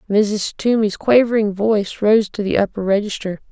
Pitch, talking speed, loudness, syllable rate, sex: 210 Hz, 155 wpm, -17 LUFS, 5.1 syllables/s, female